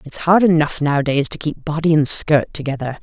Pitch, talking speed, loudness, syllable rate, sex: 150 Hz, 200 wpm, -17 LUFS, 5.6 syllables/s, female